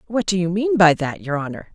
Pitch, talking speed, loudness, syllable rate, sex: 185 Hz, 275 wpm, -19 LUFS, 5.8 syllables/s, female